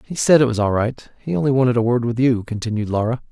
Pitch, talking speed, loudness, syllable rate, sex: 120 Hz, 270 wpm, -19 LUFS, 6.5 syllables/s, male